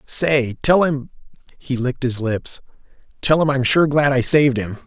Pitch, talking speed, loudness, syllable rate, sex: 135 Hz, 175 wpm, -18 LUFS, 4.7 syllables/s, male